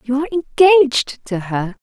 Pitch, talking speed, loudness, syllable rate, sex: 265 Hz, 165 wpm, -16 LUFS, 7.2 syllables/s, female